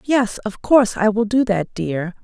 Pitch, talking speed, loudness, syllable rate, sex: 215 Hz, 215 wpm, -18 LUFS, 4.5 syllables/s, female